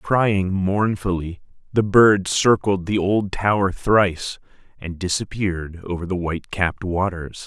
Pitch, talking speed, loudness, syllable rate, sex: 95 Hz, 130 wpm, -20 LUFS, 4.2 syllables/s, male